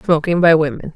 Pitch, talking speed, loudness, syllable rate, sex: 165 Hz, 190 wpm, -15 LUFS, 5.9 syllables/s, female